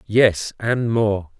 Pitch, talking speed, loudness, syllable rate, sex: 110 Hz, 130 wpm, -19 LUFS, 2.6 syllables/s, male